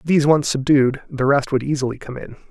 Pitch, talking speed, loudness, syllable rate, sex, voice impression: 140 Hz, 215 wpm, -18 LUFS, 5.8 syllables/s, male, masculine, very adult-like, slightly cool, friendly, reassuring